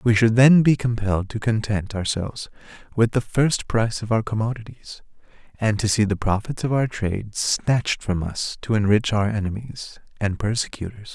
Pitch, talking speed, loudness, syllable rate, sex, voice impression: 110 Hz, 170 wpm, -22 LUFS, 5.0 syllables/s, male, masculine, adult-like, tensed, clear, fluent, cool, sincere, friendly, reassuring, slightly wild, lively, kind